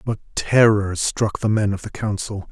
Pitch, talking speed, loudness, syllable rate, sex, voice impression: 105 Hz, 190 wpm, -20 LUFS, 4.4 syllables/s, male, very masculine, cool, calm, mature, elegant, slightly wild